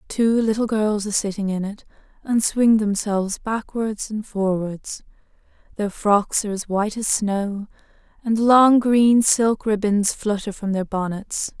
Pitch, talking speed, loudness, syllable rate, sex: 210 Hz, 150 wpm, -20 LUFS, 4.2 syllables/s, female